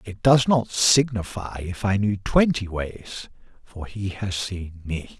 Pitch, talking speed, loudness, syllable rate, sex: 105 Hz, 160 wpm, -23 LUFS, 3.6 syllables/s, male